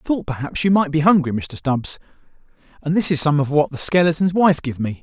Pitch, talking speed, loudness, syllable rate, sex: 155 Hz, 240 wpm, -18 LUFS, 5.9 syllables/s, male